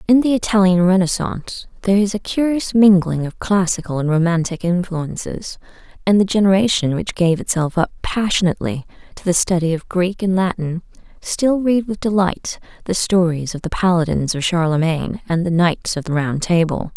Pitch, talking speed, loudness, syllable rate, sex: 180 Hz, 165 wpm, -18 LUFS, 5.3 syllables/s, female